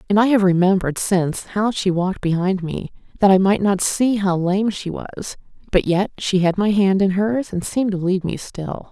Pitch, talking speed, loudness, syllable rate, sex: 195 Hz, 220 wpm, -19 LUFS, 5.2 syllables/s, female